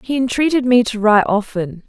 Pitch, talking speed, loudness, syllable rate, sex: 230 Hz, 190 wpm, -16 LUFS, 5.7 syllables/s, female